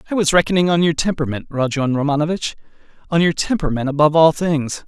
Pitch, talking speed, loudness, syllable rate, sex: 155 Hz, 170 wpm, -17 LUFS, 6.9 syllables/s, male